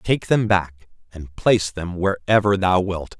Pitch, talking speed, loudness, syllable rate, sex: 95 Hz, 170 wpm, -20 LUFS, 4.1 syllables/s, male